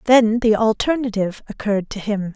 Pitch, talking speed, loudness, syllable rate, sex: 215 Hz, 155 wpm, -19 LUFS, 5.6 syllables/s, female